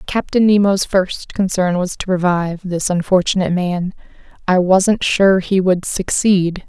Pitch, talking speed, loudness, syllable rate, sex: 185 Hz, 145 wpm, -16 LUFS, 4.4 syllables/s, female